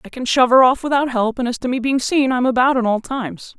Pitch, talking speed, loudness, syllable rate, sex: 250 Hz, 300 wpm, -17 LUFS, 6.3 syllables/s, female